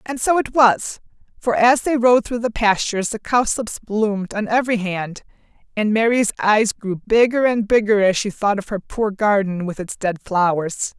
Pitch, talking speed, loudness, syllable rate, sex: 215 Hz, 190 wpm, -18 LUFS, 4.7 syllables/s, female